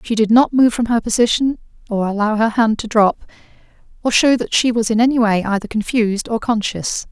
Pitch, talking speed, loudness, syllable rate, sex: 225 Hz, 210 wpm, -16 LUFS, 5.6 syllables/s, female